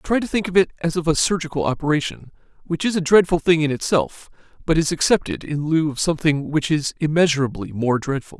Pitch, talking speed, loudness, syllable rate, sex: 155 Hz, 205 wpm, -20 LUFS, 5.9 syllables/s, male